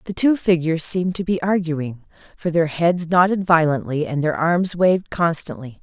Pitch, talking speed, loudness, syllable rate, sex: 170 Hz, 175 wpm, -19 LUFS, 5.0 syllables/s, female